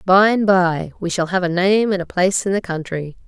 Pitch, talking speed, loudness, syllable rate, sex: 185 Hz, 255 wpm, -18 LUFS, 5.4 syllables/s, female